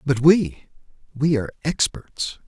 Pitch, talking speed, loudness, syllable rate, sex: 140 Hz, 120 wpm, -21 LUFS, 4.1 syllables/s, male